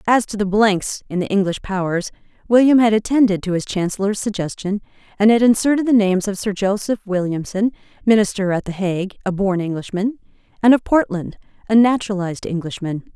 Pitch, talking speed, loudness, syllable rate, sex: 200 Hz, 170 wpm, -18 LUFS, 5.8 syllables/s, female